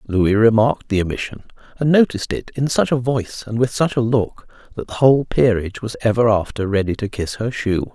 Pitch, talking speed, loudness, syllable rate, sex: 115 Hz, 210 wpm, -18 LUFS, 5.9 syllables/s, male